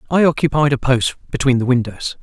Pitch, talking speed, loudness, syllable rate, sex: 135 Hz, 190 wpm, -17 LUFS, 5.9 syllables/s, male